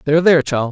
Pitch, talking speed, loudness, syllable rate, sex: 150 Hz, 255 wpm, -14 LUFS, 8.1 syllables/s, male